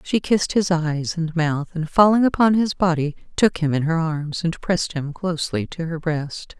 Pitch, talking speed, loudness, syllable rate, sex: 165 Hz, 210 wpm, -21 LUFS, 4.8 syllables/s, female